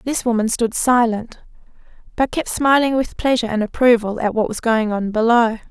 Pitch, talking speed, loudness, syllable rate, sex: 230 Hz, 180 wpm, -18 LUFS, 5.2 syllables/s, female